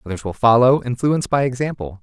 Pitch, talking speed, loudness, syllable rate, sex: 120 Hz, 180 wpm, -18 LUFS, 6.2 syllables/s, male